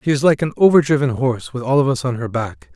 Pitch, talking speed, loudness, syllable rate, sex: 130 Hz, 285 wpm, -17 LUFS, 6.6 syllables/s, male